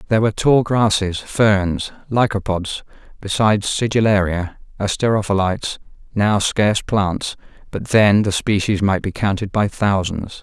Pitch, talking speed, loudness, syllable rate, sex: 100 Hz, 120 wpm, -18 LUFS, 4.6 syllables/s, male